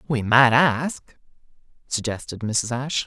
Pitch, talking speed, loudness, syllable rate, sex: 125 Hz, 115 wpm, -21 LUFS, 4.0 syllables/s, male